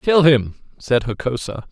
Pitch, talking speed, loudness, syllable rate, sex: 135 Hz, 140 wpm, -18 LUFS, 4.2 syllables/s, male